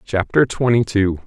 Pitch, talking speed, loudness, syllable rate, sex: 110 Hz, 140 wpm, -17 LUFS, 4.4 syllables/s, male